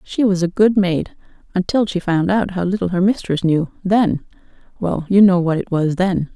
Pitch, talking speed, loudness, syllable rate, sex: 185 Hz, 190 wpm, -17 LUFS, 4.8 syllables/s, female